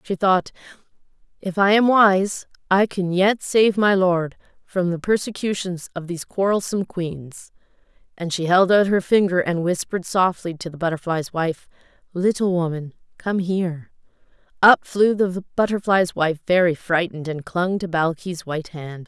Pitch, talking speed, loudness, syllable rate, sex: 180 Hz, 155 wpm, -20 LUFS, 4.7 syllables/s, female